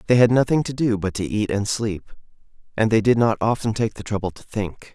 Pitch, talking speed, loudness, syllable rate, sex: 110 Hz, 245 wpm, -21 LUFS, 5.6 syllables/s, male